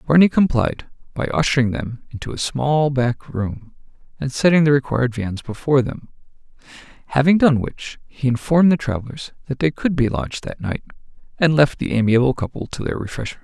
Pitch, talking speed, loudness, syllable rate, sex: 135 Hz, 175 wpm, -19 LUFS, 5.5 syllables/s, male